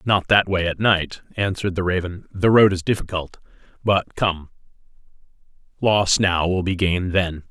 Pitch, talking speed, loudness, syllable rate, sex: 95 Hz, 150 wpm, -20 LUFS, 4.7 syllables/s, male